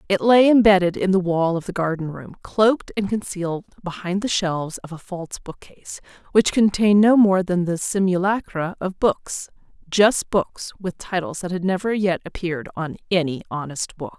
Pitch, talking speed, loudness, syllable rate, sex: 185 Hz, 180 wpm, -21 LUFS, 5.0 syllables/s, female